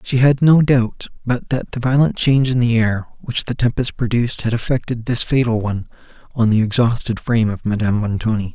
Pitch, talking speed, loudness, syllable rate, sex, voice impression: 120 Hz, 195 wpm, -18 LUFS, 5.7 syllables/s, male, masculine, adult-like, slightly relaxed, slightly weak, soft, slightly raspy, slightly refreshing, sincere, calm, kind, modest